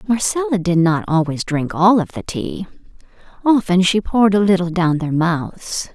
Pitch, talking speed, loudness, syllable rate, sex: 185 Hz, 170 wpm, -17 LUFS, 4.6 syllables/s, female